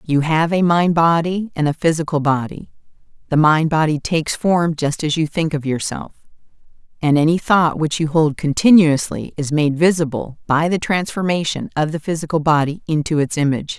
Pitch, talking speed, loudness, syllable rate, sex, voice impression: 160 Hz, 175 wpm, -17 LUFS, 5.2 syllables/s, female, feminine, slightly gender-neutral, adult-like, middle-aged, slightly thick, tensed, powerful, slightly bright, slightly hard, clear, fluent, slightly cool, intellectual, sincere, calm, slightly mature, reassuring, elegant, slightly strict, slightly sharp